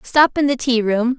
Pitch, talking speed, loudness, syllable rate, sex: 250 Hz, 255 wpm, -17 LUFS, 4.6 syllables/s, female